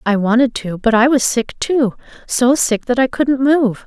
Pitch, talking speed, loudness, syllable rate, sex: 245 Hz, 215 wpm, -15 LUFS, 4.4 syllables/s, female